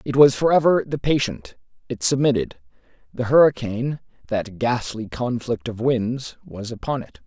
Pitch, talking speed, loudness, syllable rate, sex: 125 Hz, 150 wpm, -21 LUFS, 4.1 syllables/s, male